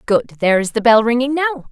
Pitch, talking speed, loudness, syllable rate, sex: 225 Hz, 245 wpm, -15 LUFS, 6.9 syllables/s, female